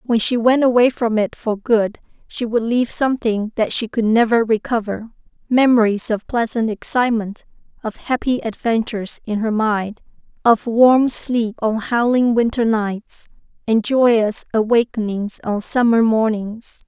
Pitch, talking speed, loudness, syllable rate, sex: 225 Hz, 140 wpm, -18 LUFS, 4.4 syllables/s, female